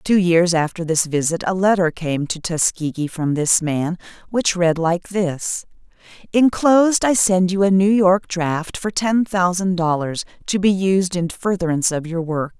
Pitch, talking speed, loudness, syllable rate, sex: 180 Hz, 175 wpm, -18 LUFS, 4.3 syllables/s, female